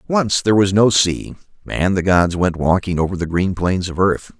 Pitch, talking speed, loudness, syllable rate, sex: 95 Hz, 220 wpm, -17 LUFS, 4.9 syllables/s, male